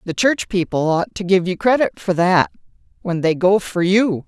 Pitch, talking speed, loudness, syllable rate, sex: 185 Hz, 210 wpm, -18 LUFS, 4.6 syllables/s, female